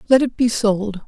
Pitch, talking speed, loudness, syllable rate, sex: 220 Hz, 225 wpm, -18 LUFS, 4.8 syllables/s, female